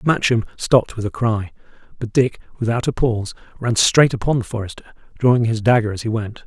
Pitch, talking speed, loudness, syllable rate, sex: 115 Hz, 195 wpm, -19 LUFS, 5.9 syllables/s, male